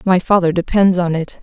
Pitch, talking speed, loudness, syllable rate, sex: 180 Hz, 210 wpm, -15 LUFS, 5.3 syllables/s, female